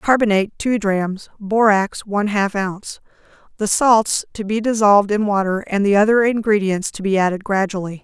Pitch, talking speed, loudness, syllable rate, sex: 205 Hz, 165 wpm, -17 LUFS, 5.1 syllables/s, female